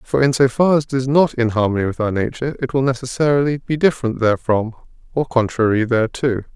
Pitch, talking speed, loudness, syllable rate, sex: 125 Hz, 200 wpm, -18 LUFS, 6.4 syllables/s, male